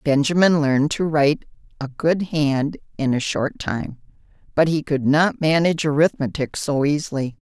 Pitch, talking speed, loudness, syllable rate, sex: 150 Hz, 155 wpm, -20 LUFS, 4.9 syllables/s, female